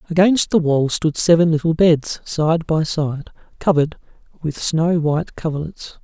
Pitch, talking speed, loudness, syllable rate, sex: 160 Hz, 150 wpm, -18 LUFS, 4.6 syllables/s, male